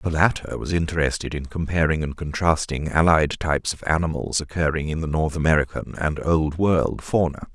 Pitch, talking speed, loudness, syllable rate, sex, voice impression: 80 Hz, 165 wpm, -22 LUFS, 5.3 syllables/s, male, masculine, adult-like, tensed, slightly hard, clear, slightly fluent, raspy, cool, calm, slightly mature, friendly, reassuring, wild, slightly lively, kind